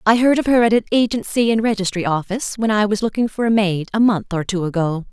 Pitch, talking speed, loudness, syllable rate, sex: 210 Hz, 260 wpm, -18 LUFS, 6.2 syllables/s, female